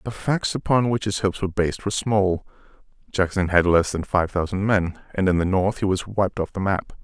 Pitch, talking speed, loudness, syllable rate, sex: 95 Hz, 240 wpm, -22 LUFS, 5.7 syllables/s, male